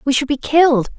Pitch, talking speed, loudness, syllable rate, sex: 280 Hz, 245 wpm, -15 LUFS, 6.0 syllables/s, female